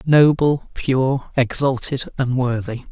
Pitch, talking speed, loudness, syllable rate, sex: 130 Hz, 105 wpm, -19 LUFS, 3.4 syllables/s, male